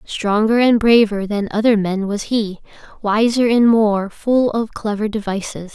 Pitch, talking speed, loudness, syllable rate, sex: 215 Hz, 155 wpm, -17 LUFS, 4.2 syllables/s, female